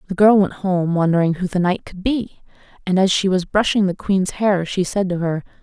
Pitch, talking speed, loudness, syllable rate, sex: 185 Hz, 235 wpm, -18 LUFS, 5.2 syllables/s, female